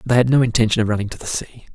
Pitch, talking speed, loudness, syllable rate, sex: 115 Hz, 345 wpm, -18 LUFS, 8.3 syllables/s, male